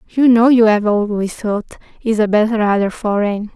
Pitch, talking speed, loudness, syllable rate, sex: 215 Hz, 135 wpm, -15 LUFS, 4.7 syllables/s, female